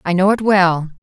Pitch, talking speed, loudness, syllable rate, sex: 190 Hz, 235 wpm, -14 LUFS, 4.8 syllables/s, female